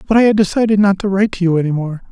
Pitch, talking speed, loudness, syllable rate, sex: 195 Hz, 310 wpm, -14 LUFS, 8.0 syllables/s, male